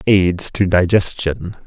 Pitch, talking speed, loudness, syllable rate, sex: 95 Hz, 110 wpm, -16 LUFS, 3.5 syllables/s, male